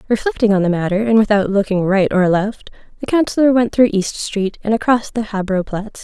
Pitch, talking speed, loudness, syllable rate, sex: 210 Hz, 210 wpm, -16 LUFS, 5.4 syllables/s, female